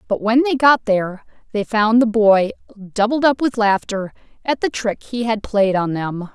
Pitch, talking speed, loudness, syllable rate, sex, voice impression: 215 Hz, 200 wpm, -18 LUFS, 4.5 syllables/s, female, feminine, slightly adult-like, slightly tensed, slightly powerful, intellectual, slightly calm, slightly lively